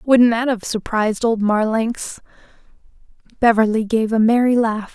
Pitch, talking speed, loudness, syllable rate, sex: 225 Hz, 135 wpm, -17 LUFS, 4.6 syllables/s, female